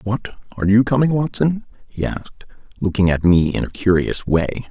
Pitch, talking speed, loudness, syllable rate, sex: 110 Hz, 180 wpm, -18 LUFS, 5.3 syllables/s, male